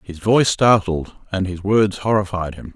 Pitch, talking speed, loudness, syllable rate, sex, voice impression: 95 Hz, 175 wpm, -18 LUFS, 4.7 syllables/s, male, very masculine, very adult-like, very middle-aged, very thick, slightly tensed, powerful, slightly bright, hard, clear, muffled, fluent, slightly raspy, very cool, very intellectual, sincere, very calm, very mature, friendly, very reassuring, very unique, slightly elegant, very wild, sweet, slightly lively, very kind